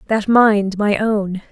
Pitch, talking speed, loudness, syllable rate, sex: 205 Hz, 160 wpm, -16 LUFS, 3.2 syllables/s, female